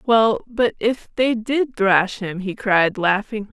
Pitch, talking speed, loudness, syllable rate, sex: 215 Hz, 170 wpm, -19 LUFS, 3.4 syllables/s, female